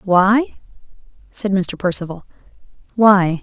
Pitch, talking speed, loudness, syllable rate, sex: 195 Hz, 70 wpm, -16 LUFS, 3.8 syllables/s, female